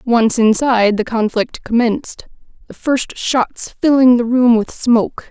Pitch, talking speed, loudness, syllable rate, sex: 235 Hz, 145 wpm, -15 LUFS, 4.2 syllables/s, female